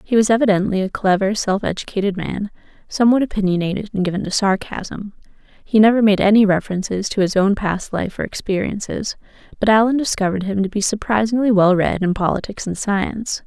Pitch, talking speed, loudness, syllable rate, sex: 205 Hz, 175 wpm, -18 LUFS, 5.9 syllables/s, female